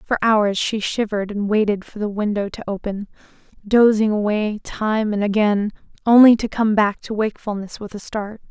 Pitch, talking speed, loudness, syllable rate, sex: 210 Hz, 175 wpm, -19 LUFS, 5.0 syllables/s, female